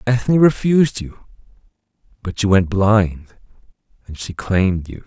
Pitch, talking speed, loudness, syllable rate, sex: 105 Hz, 130 wpm, -17 LUFS, 4.5 syllables/s, male